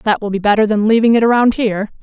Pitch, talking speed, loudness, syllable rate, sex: 215 Hz, 265 wpm, -13 LUFS, 6.8 syllables/s, female